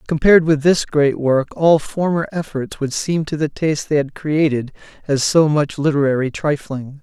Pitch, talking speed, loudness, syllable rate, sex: 150 Hz, 180 wpm, -17 LUFS, 4.8 syllables/s, male